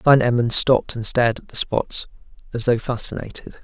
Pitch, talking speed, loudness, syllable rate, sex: 120 Hz, 180 wpm, -20 LUFS, 5.5 syllables/s, male